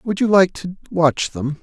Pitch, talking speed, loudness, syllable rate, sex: 170 Hz, 220 wpm, -18 LUFS, 4.1 syllables/s, male